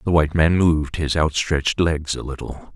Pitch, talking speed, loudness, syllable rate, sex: 80 Hz, 195 wpm, -20 LUFS, 5.3 syllables/s, male